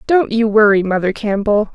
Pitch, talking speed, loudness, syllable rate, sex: 215 Hz, 170 wpm, -14 LUFS, 5.1 syllables/s, female